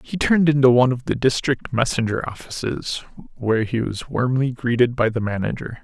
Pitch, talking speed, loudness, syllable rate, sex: 125 Hz, 175 wpm, -20 LUFS, 5.5 syllables/s, male